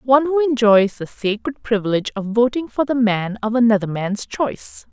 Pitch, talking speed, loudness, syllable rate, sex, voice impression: 230 Hz, 185 wpm, -19 LUFS, 5.3 syllables/s, female, very feminine, adult-like, very thin, tensed, slightly powerful, bright, slightly hard, clear, fluent, slightly raspy, slightly cool, intellectual, refreshing, sincere, calm, slightly friendly, reassuring, very unique, slightly elegant, wild, lively, slightly strict, slightly intense, sharp